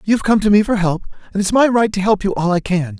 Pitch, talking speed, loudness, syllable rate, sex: 200 Hz, 320 wpm, -16 LUFS, 6.6 syllables/s, male